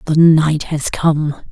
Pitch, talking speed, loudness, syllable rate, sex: 155 Hz, 160 wpm, -14 LUFS, 3.1 syllables/s, female